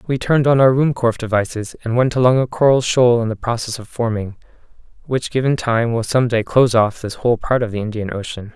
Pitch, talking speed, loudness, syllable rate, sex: 120 Hz, 215 wpm, -17 LUFS, 6.0 syllables/s, male